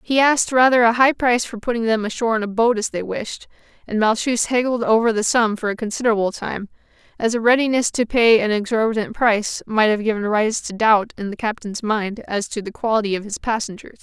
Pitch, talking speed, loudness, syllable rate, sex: 225 Hz, 220 wpm, -19 LUFS, 5.9 syllables/s, female